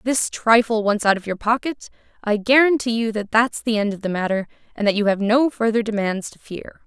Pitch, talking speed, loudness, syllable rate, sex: 220 Hz, 225 wpm, -20 LUFS, 5.4 syllables/s, female